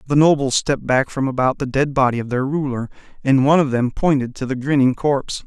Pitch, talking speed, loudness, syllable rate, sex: 135 Hz, 230 wpm, -18 LUFS, 6.1 syllables/s, male